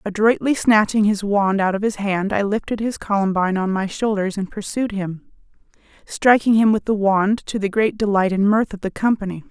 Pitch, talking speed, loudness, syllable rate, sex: 205 Hz, 200 wpm, -19 LUFS, 5.2 syllables/s, female